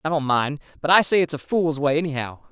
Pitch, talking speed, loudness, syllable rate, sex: 145 Hz, 265 wpm, -21 LUFS, 5.9 syllables/s, male